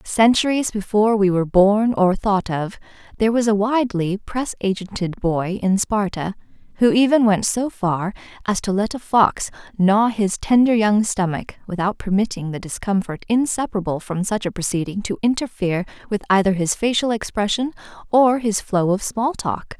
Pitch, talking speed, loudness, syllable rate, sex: 205 Hz, 165 wpm, -20 LUFS, 5.0 syllables/s, female